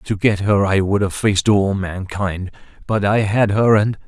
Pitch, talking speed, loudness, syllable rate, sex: 100 Hz, 190 wpm, -17 LUFS, 4.5 syllables/s, male